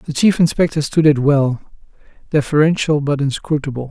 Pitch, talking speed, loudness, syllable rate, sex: 145 Hz, 140 wpm, -16 LUFS, 5.2 syllables/s, male